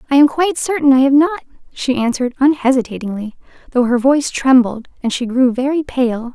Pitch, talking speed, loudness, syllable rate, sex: 265 Hz, 180 wpm, -15 LUFS, 5.9 syllables/s, female